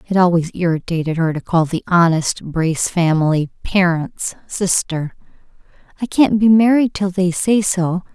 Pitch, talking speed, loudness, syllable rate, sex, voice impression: 180 Hz, 145 wpm, -17 LUFS, 4.6 syllables/s, female, very feminine, slightly young, very thin, slightly tensed, slightly powerful, bright, slightly soft, very clear, very fluent, very cute, very intellectual, refreshing, very sincere, calm, very friendly, very reassuring, unique, very elegant, slightly wild, very sweet, lively, very kind, slightly sharp